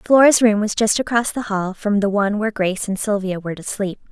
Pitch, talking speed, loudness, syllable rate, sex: 205 Hz, 250 wpm, -19 LUFS, 6.1 syllables/s, female